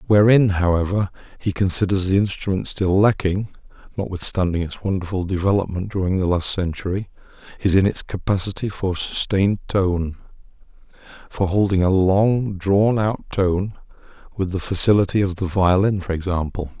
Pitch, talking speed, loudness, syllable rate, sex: 95 Hz, 130 wpm, -20 LUFS, 5.1 syllables/s, male